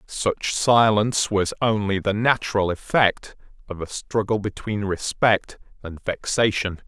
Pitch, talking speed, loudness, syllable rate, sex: 105 Hz, 120 wpm, -22 LUFS, 4.1 syllables/s, male